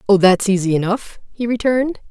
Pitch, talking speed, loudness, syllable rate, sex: 210 Hz, 170 wpm, -17 LUFS, 5.7 syllables/s, female